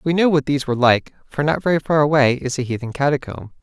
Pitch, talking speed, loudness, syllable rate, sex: 140 Hz, 250 wpm, -18 LUFS, 6.5 syllables/s, male